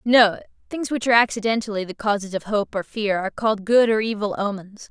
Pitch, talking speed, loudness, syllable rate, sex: 215 Hz, 195 wpm, -21 LUFS, 6.0 syllables/s, female